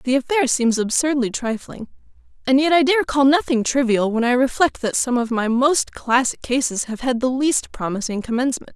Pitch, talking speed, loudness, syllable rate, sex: 255 Hz, 190 wpm, -19 LUFS, 5.2 syllables/s, female